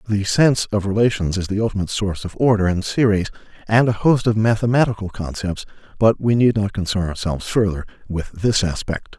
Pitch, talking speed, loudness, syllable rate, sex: 105 Hz, 185 wpm, -19 LUFS, 5.9 syllables/s, male